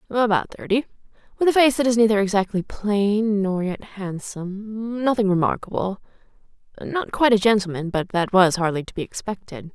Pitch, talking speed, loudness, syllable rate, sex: 205 Hz, 150 wpm, -21 LUFS, 5.2 syllables/s, female